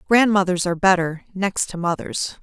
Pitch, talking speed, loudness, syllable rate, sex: 185 Hz, 150 wpm, -20 LUFS, 5.2 syllables/s, female